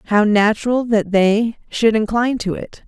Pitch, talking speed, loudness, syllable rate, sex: 220 Hz, 165 wpm, -17 LUFS, 4.8 syllables/s, female